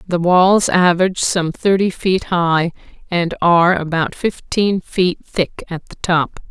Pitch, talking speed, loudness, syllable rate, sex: 180 Hz, 150 wpm, -16 LUFS, 4.0 syllables/s, female